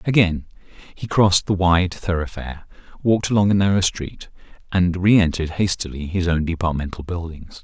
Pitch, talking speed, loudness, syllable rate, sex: 90 Hz, 140 wpm, -20 LUFS, 5.4 syllables/s, male